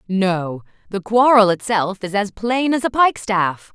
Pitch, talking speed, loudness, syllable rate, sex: 205 Hz, 145 wpm, -17 LUFS, 4.3 syllables/s, female